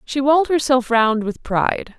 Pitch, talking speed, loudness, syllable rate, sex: 255 Hz, 180 wpm, -18 LUFS, 4.8 syllables/s, female